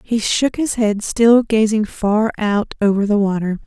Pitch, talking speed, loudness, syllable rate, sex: 215 Hz, 180 wpm, -17 LUFS, 4.1 syllables/s, female